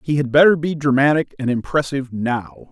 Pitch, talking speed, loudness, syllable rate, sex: 140 Hz, 175 wpm, -18 LUFS, 5.6 syllables/s, male